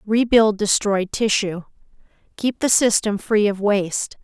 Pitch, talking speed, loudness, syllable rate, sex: 210 Hz, 130 wpm, -19 LUFS, 4.1 syllables/s, female